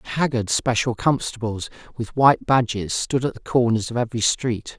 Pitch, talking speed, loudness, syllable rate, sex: 120 Hz, 165 wpm, -21 LUFS, 5.0 syllables/s, male